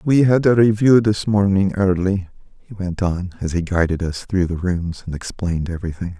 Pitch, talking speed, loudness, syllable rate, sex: 95 Hz, 195 wpm, -19 LUFS, 5.2 syllables/s, male